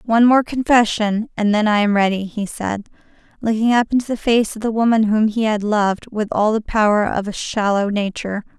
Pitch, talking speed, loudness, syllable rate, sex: 215 Hz, 210 wpm, -18 LUFS, 5.5 syllables/s, female